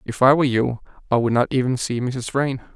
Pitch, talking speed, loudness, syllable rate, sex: 125 Hz, 240 wpm, -20 LUFS, 5.8 syllables/s, male